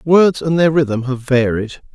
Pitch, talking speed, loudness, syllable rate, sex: 140 Hz, 185 wpm, -15 LUFS, 3.9 syllables/s, male